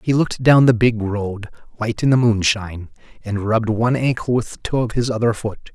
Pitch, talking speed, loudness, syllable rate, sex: 115 Hz, 220 wpm, -18 LUFS, 5.9 syllables/s, male